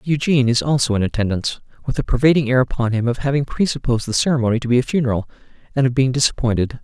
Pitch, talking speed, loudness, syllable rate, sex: 125 Hz, 210 wpm, -18 LUFS, 7.5 syllables/s, male